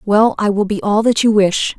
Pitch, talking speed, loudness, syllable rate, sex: 210 Hz, 270 wpm, -14 LUFS, 5.0 syllables/s, female